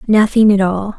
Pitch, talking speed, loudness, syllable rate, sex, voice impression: 205 Hz, 185 wpm, -13 LUFS, 4.7 syllables/s, female, feminine, young, slightly relaxed, powerful, bright, soft, slightly fluent, raspy, cute, refreshing, friendly, lively, slightly kind